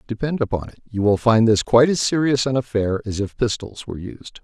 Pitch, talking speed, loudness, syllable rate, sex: 115 Hz, 230 wpm, -20 LUFS, 5.8 syllables/s, male